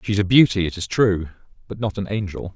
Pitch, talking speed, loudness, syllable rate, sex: 100 Hz, 235 wpm, -20 LUFS, 5.9 syllables/s, male